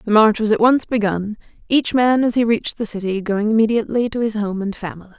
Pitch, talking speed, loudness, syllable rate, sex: 215 Hz, 230 wpm, -18 LUFS, 6.2 syllables/s, female